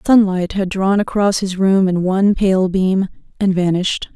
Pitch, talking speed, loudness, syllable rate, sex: 190 Hz, 175 wpm, -16 LUFS, 4.6 syllables/s, female